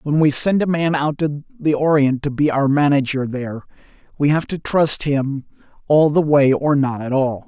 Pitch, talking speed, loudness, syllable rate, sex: 145 Hz, 210 wpm, -18 LUFS, 4.7 syllables/s, male